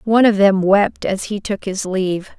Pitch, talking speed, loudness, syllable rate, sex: 195 Hz, 225 wpm, -17 LUFS, 4.9 syllables/s, female